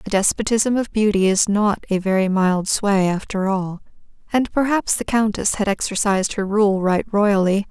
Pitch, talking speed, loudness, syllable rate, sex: 205 Hz, 170 wpm, -19 LUFS, 4.6 syllables/s, female